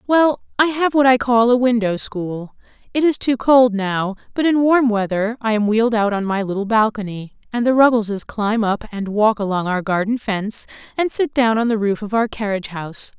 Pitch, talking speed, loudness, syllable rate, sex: 225 Hz, 215 wpm, -18 LUFS, 5.2 syllables/s, female